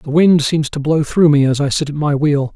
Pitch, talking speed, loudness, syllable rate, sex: 150 Hz, 305 wpm, -14 LUFS, 5.2 syllables/s, male